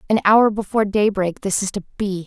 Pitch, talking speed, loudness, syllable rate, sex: 200 Hz, 210 wpm, -19 LUFS, 5.4 syllables/s, female